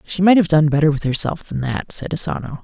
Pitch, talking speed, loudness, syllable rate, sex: 155 Hz, 250 wpm, -18 LUFS, 5.9 syllables/s, male